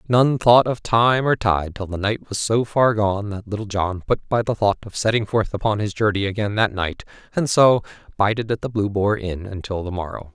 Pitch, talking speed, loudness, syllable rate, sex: 105 Hz, 230 wpm, -20 LUFS, 5.2 syllables/s, male